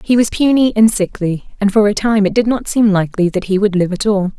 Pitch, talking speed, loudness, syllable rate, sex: 205 Hz, 275 wpm, -14 LUFS, 5.9 syllables/s, female